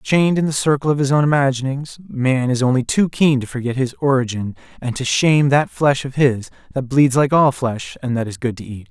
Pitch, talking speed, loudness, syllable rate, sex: 135 Hz, 235 wpm, -18 LUFS, 5.5 syllables/s, male